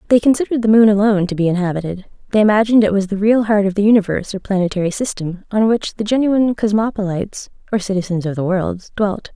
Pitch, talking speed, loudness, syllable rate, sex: 205 Hz, 205 wpm, -16 LUFS, 6.9 syllables/s, female